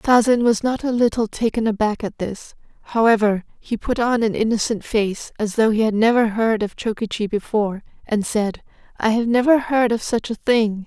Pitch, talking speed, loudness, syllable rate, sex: 220 Hz, 190 wpm, -20 LUFS, 4.9 syllables/s, female